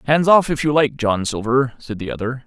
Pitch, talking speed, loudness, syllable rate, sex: 130 Hz, 245 wpm, -18 LUFS, 5.3 syllables/s, male